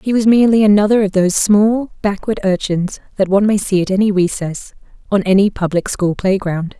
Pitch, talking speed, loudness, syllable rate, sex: 200 Hz, 185 wpm, -15 LUFS, 5.6 syllables/s, female